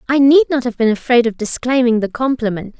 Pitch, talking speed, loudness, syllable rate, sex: 245 Hz, 215 wpm, -15 LUFS, 5.9 syllables/s, female